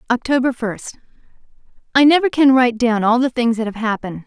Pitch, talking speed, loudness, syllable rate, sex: 245 Hz, 170 wpm, -16 LUFS, 6.2 syllables/s, female